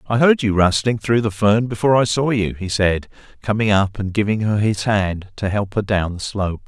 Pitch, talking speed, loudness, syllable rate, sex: 105 Hz, 235 wpm, -18 LUFS, 5.2 syllables/s, male